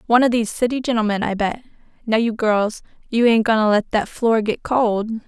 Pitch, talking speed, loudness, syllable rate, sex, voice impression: 225 Hz, 215 wpm, -19 LUFS, 5.5 syllables/s, female, very feminine, young, very thin, tensed, slightly weak, bright, slightly hard, clear, slightly fluent, very cute, intellectual, very refreshing, sincere, calm, very friendly, reassuring, unique, elegant, very sweet, slightly lively, very kind, slightly sharp, modest